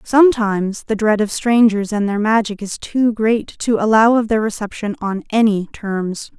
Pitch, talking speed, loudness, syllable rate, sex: 215 Hz, 180 wpm, -17 LUFS, 4.6 syllables/s, female